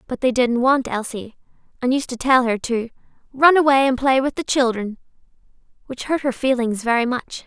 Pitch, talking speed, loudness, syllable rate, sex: 250 Hz, 195 wpm, -19 LUFS, 5.2 syllables/s, female